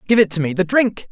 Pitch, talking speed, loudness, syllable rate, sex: 190 Hz, 320 wpm, -17 LUFS, 6.3 syllables/s, male